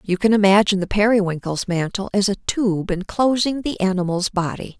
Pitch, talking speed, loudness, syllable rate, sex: 200 Hz, 165 wpm, -19 LUFS, 5.4 syllables/s, female